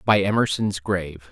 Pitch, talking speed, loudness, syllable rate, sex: 95 Hz, 135 wpm, -22 LUFS, 5.0 syllables/s, male